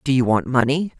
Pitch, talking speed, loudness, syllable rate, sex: 135 Hz, 240 wpm, -19 LUFS, 5.8 syllables/s, female